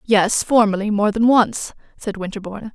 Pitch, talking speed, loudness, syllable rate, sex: 210 Hz, 155 wpm, -18 LUFS, 5.0 syllables/s, female